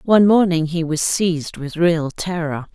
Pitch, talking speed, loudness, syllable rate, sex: 170 Hz, 175 wpm, -18 LUFS, 4.5 syllables/s, female